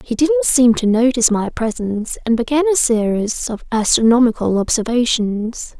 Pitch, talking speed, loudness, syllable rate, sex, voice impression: 240 Hz, 145 wpm, -16 LUFS, 4.9 syllables/s, female, feminine, slightly young, slightly soft, cute, slightly refreshing, friendly